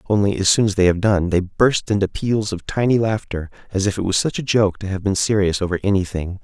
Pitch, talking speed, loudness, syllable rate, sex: 100 Hz, 250 wpm, -19 LUFS, 5.8 syllables/s, male